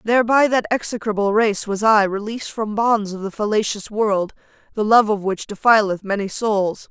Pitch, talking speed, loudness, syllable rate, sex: 210 Hz, 185 wpm, -19 LUFS, 5.0 syllables/s, female